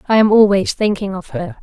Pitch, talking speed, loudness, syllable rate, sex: 195 Hz, 220 wpm, -15 LUFS, 5.7 syllables/s, female